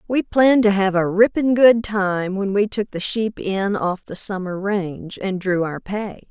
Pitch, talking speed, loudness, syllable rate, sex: 200 Hz, 210 wpm, -19 LUFS, 4.3 syllables/s, female